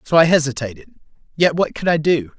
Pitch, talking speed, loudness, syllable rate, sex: 155 Hz, 200 wpm, -17 LUFS, 5.9 syllables/s, male